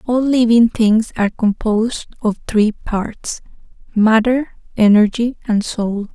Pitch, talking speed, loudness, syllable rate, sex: 225 Hz, 115 wpm, -16 LUFS, 3.9 syllables/s, female